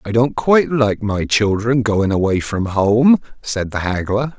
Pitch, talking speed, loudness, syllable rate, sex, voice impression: 115 Hz, 180 wpm, -17 LUFS, 4.2 syllables/s, male, masculine, very adult-like, slightly thick, tensed, slightly powerful, very bright, soft, very clear, fluent, slightly raspy, cool, intellectual, very refreshing, sincere, calm, mature, very friendly, very reassuring, very unique, slightly elegant, wild, slightly sweet, very lively, kind, intense, light